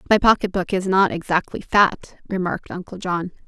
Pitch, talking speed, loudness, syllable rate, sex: 185 Hz, 155 wpm, -20 LUFS, 5.2 syllables/s, female